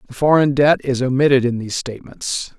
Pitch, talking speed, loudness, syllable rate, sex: 135 Hz, 185 wpm, -17 LUFS, 5.9 syllables/s, male